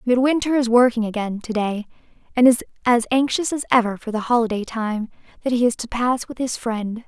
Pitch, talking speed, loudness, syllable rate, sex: 235 Hz, 205 wpm, -20 LUFS, 5.5 syllables/s, female